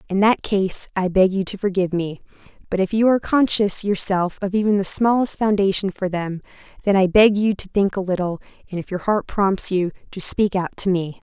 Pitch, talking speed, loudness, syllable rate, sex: 195 Hz, 220 wpm, -20 LUFS, 5.4 syllables/s, female